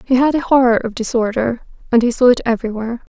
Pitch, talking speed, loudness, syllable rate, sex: 240 Hz, 210 wpm, -16 LUFS, 6.7 syllables/s, female